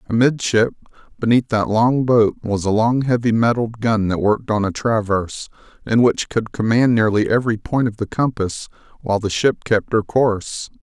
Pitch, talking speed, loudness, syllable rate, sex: 110 Hz, 175 wpm, -18 LUFS, 5.2 syllables/s, male